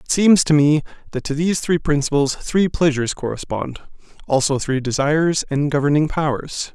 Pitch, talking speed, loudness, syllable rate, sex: 150 Hz, 160 wpm, -19 LUFS, 5.3 syllables/s, male